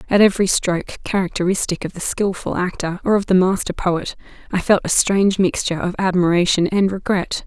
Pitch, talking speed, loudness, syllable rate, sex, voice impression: 185 Hz, 175 wpm, -18 LUFS, 5.9 syllables/s, female, feminine, adult-like, relaxed, slightly powerful, soft, fluent, slightly raspy, intellectual, calm, friendly, reassuring, elegant, lively, slightly modest